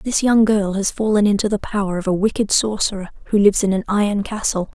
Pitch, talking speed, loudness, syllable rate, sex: 205 Hz, 225 wpm, -18 LUFS, 6.1 syllables/s, female